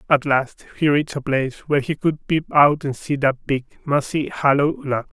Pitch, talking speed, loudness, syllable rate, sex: 145 Hz, 210 wpm, -20 LUFS, 5.1 syllables/s, male